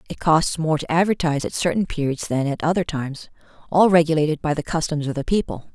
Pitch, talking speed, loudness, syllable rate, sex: 160 Hz, 210 wpm, -21 LUFS, 6.2 syllables/s, female